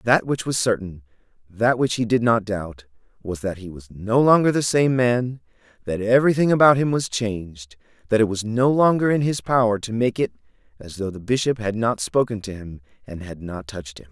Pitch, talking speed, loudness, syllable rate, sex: 110 Hz, 215 wpm, -21 LUFS, 5.3 syllables/s, male